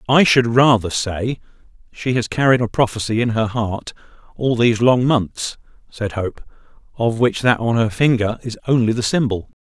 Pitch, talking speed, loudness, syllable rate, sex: 115 Hz, 175 wpm, -18 LUFS, 4.8 syllables/s, male